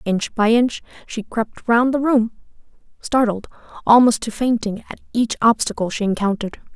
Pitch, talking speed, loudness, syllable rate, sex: 225 Hz, 150 wpm, -19 LUFS, 4.9 syllables/s, female